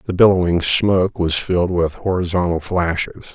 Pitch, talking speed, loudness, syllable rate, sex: 90 Hz, 145 wpm, -17 LUFS, 5.2 syllables/s, male